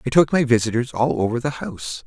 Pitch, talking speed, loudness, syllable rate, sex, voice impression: 120 Hz, 230 wpm, -20 LUFS, 6.2 syllables/s, male, masculine, adult-like, slightly thick, slightly fluent, cool, slightly refreshing, sincere